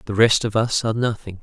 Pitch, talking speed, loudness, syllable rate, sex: 110 Hz, 250 wpm, -20 LUFS, 6.3 syllables/s, male